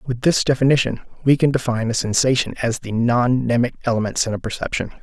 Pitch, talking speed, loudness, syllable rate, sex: 125 Hz, 190 wpm, -19 LUFS, 6.5 syllables/s, male